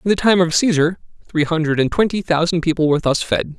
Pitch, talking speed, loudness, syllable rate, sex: 170 Hz, 235 wpm, -17 LUFS, 6.3 syllables/s, male